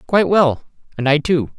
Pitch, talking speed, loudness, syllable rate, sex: 155 Hz, 190 wpm, -16 LUFS, 5.4 syllables/s, male